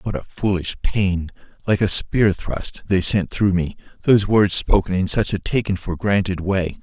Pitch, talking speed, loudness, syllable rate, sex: 95 Hz, 185 wpm, -20 LUFS, 4.6 syllables/s, male